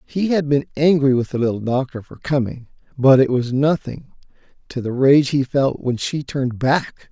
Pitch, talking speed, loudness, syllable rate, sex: 135 Hz, 195 wpm, -18 LUFS, 4.8 syllables/s, male